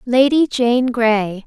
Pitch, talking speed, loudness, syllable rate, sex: 240 Hz, 125 wpm, -16 LUFS, 3.0 syllables/s, female